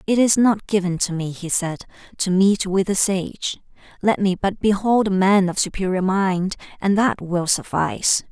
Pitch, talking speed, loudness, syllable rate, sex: 190 Hz, 190 wpm, -20 LUFS, 4.5 syllables/s, female